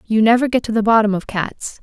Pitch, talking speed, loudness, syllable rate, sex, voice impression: 220 Hz, 265 wpm, -16 LUFS, 5.8 syllables/s, female, feminine, slightly adult-like, clear, slightly fluent, slightly refreshing, friendly, slightly lively